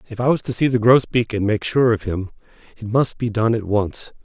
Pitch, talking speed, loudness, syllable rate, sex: 115 Hz, 255 wpm, -19 LUFS, 5.4 syllables/s, male